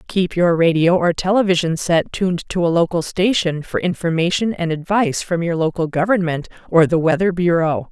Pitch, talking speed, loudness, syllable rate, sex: 170 Hz, 175 wpm, -18 LUFS, 5.3 syllables/s, female